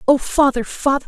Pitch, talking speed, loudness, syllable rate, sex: 270 Hz, 170 wpm, -17 LUFS, 5.5 syllables/s, female